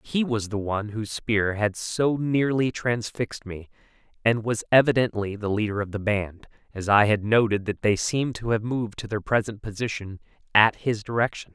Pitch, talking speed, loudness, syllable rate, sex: 110 Hz, 185 wpm, -24 LUFS, 5.2 syllables/s, male